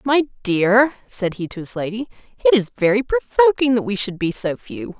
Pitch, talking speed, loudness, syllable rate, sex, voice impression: 230 Hz, 205 wpm, -19 LUFS, 5.0 syllables/s, female, feminine, slightly adult-like, slightly powerful, unique, slightly lively, slightly intense